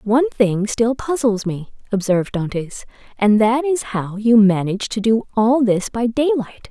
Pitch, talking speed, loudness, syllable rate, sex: 225 Hz, 170 wpm, -18 LUFS, 4.4 syllables/s, female